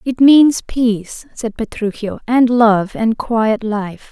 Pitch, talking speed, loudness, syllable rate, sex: 225 Hz, 145 wpm, -15 LUFS, 3.4 syllables/s, female